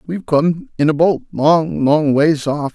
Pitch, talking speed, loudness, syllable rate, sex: 155 Hz, 195 wpm, -15 LUFS, 4.1 syllables/s, male